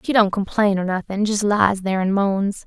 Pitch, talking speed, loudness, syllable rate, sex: 200 Hz, 205 wpm, -20 LUFS, 5.1 syllables/s, female